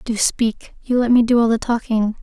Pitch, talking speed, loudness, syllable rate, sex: 230 Hz, 240 wpm, -18 LUFS, 4.9 syllables/s, female